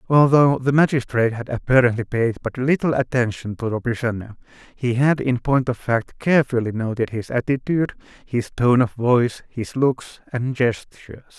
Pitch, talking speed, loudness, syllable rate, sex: 125 Hz, 160 wpm, -20 LUFS, 5.1 syllables/s, male